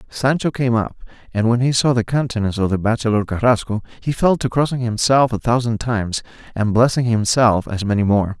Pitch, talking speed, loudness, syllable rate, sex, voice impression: 115 Hz, 195 wpm, -18 LUFS, 5.7 syllables/s, male, masculine, adult-like, relaxed, slightly weak, soft, fluent, slightly raspy, intellectual, calm, friendly, reassuring, slightly wild, kind, slightly modest